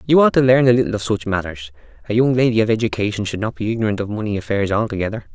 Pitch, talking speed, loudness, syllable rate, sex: 110 Hz, 245 wpm, -18 LUFS, 7.3 syllables/s, male